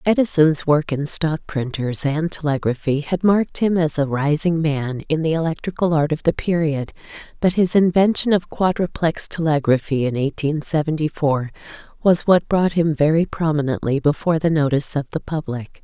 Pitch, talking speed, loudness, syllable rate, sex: 155 Hz, 165 wpm, -19 LUFS, 5.1 syllables/s, female